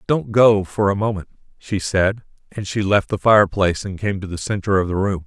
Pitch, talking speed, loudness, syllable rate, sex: 100 Hz, 230 wpm, -19 LUFS, 5.5 syllables/s, male